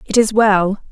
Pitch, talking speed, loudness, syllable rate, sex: 205 Hz, 195 wpm, -14 LUFS, 4.2 syllables/s, female